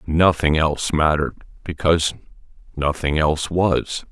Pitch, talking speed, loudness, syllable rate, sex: 80 Hz, 100 wpm, -20 LUFS, 5.0 syllables/s, male